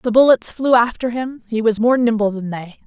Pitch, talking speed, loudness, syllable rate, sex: 230 Hz, 230 wpm, -17 LUFS, 5.1 syllables/s, female